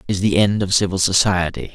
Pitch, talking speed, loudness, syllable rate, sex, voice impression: 95 Hz, 240 wpm, -17 LUFS, 6.0 syllables/s, male, very masculine, very adult-like, middle-aged, very thick, relaxed, weak, dark, slightly soft, very muffled, fluent, slightly raspy, cool, intellectual, slightly refreshing, sincere, very calm, mature, friendly, very reassuring, very unique, elegant, very sweet, slightly lively, kind, slightly modest